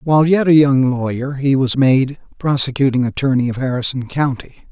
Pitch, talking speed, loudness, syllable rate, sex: 135 Hz, 165 wpm, -16 LUFS, 5.3 syllables/s, male